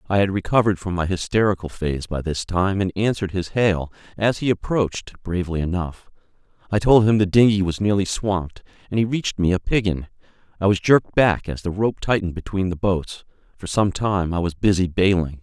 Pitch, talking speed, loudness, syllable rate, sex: 95 Hz, 200 wpm, -21 LUFS, 5.8 syllables/s, male